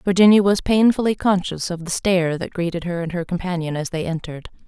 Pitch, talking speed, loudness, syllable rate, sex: 180 Hz, 205 wpm, -20 LUFS, 6.1 syllables/s, female